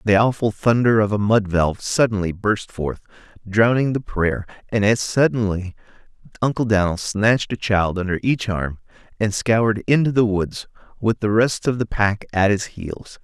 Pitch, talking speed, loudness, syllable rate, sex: 105 Hz, 170 wpm, -20 LUFS, 4.7 syllables/s, male